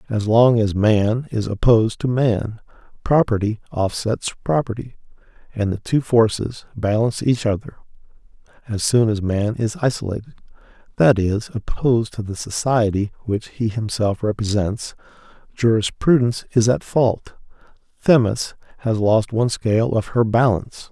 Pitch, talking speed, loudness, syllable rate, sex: 115 Hz, 130 wpm, -20 LUFS, 4.7 syllables/s, male